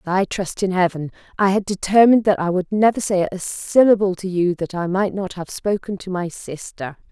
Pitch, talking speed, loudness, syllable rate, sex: 190 Hz, 220 wpm, -19 LUFS, 5.3 syllables/s, female